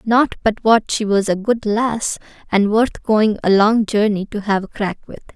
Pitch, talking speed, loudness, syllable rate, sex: 215 Hz, 215 wpm, -17 LUFS, 4.5 syllables/s, female